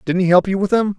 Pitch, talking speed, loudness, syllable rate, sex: 190 Hz, 365 wpm, -16 LUFS, 6.7 syllables/s, male